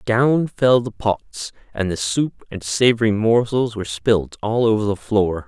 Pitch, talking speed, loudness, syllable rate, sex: 110 Hz, 175 wpm, -19 LUFS, 4.2 syllables/s, male